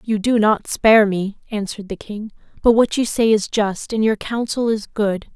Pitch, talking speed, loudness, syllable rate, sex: 215 Hz, 215 wpm, -18 LUFS, 4.8 syllables/s, female